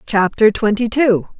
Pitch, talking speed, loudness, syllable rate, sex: 220 Hz, 130 wpm, -15 LUFS, 4.2 syllables/s, female